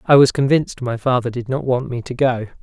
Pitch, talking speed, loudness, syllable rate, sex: 125 Hz, 250 wpm, -18 LUFS, 5.8 syllables/s, male